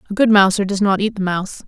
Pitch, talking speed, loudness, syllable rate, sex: 200 Hz, 285 wpm, -16 LUFS, 6.9 syllables/s, female